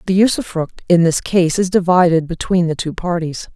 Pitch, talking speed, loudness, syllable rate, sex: 175 Hz, 185 wpm, -16 LUFS, 5.1 syllables/s, female